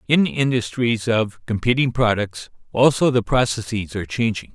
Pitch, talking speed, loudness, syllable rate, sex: 115 Hz, 130 wpm, -20 LUFS, 4.9 syllables/s, male